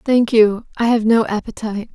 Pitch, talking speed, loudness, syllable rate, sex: 220 Hz, 185 wpm, -17 LUFS, 5.2 syllables/s, female